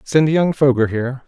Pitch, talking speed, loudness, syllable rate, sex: 135 Hz, 190 wpm, -16 LUFS, 5.1 syllables/s, male